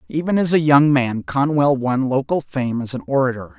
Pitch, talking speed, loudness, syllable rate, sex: 140 Hz, 200 wpm, -18 LUFS, 5.0 syllables/s, male